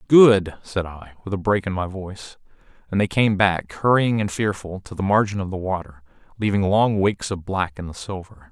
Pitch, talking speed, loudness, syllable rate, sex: 95 Hz, 210 wpm, -21 LUFS, 5.2 syllables/s, male